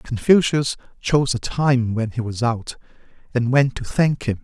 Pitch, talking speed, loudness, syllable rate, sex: 125 Hz, 175 wpm, -20 LUFS, 4.5 syllables/s, male